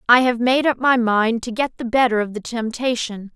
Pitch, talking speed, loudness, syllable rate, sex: 235 Hz, 235 wpm, -19 LUFS, 5.1 syllables/s, female